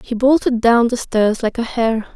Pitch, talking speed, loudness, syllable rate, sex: 235 Hz, 225 wpm, -16 LUFS, 4.5 syllables/s, female